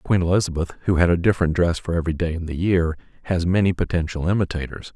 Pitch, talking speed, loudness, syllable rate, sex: 85 Hz, 205 wpm, -21 LUFS, 6.8 syllables/s, male